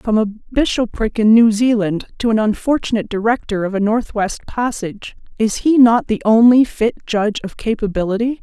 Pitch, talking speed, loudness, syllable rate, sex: 220 Hz, 165 wpm, -16 LUFS, 5.2 syllables/s, female